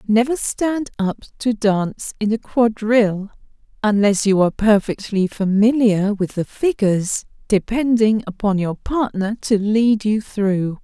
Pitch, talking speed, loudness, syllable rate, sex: 215 Hz, 135 wpm, -18 LUFS, 4.2 syllables/s, female